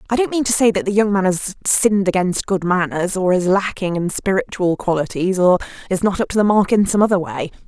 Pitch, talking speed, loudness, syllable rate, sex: 190 Hz, 240 wpm, -17 LUFS, 5.8 syllables/s, female